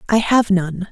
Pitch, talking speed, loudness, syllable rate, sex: 200 Hz, 195 wpm, -16 LUFS, 4.1 syllables/s, female